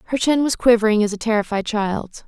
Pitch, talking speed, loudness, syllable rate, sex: 220 Hz, 210 wpm, -19 LUFS, 6.0 syllables/s, female